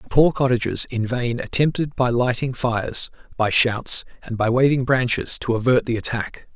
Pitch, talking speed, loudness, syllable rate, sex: 125 Hz, 175 wpm, -21 LUFS, 4.9 syllables/s, male